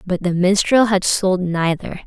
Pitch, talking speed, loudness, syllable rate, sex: 185 Hz, 175 wpm, -17 LUFS, 4.2 syllables/s, female